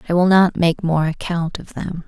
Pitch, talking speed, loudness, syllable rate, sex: 170 Hz, 230 wpm, -18 LUFS, 4.8 syllables/s, female